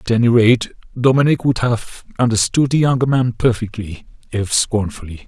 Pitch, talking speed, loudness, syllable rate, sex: 115 Hz, 135 wpm, -16 LUFS, 5.1 syllables/s, male